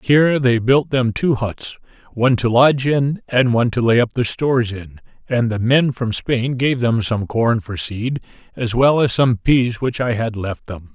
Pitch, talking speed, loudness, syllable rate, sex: 120 Hz, 215 wpm, -17 LUFS, 4.5 syllables/s, male